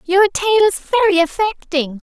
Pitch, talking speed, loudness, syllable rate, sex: 370 Hz, 140 wpm, -16 LUFS, 4.2 syllables/s, female